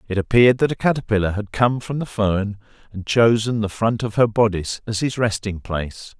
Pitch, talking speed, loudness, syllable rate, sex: 110 Hz, 205 wpm, -20 LUFS, 5.5 syllables/s, male